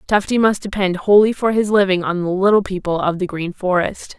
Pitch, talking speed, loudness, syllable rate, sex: 190 Hz, 215 wpm, -17 LUFS, 5.4 syllables/s, female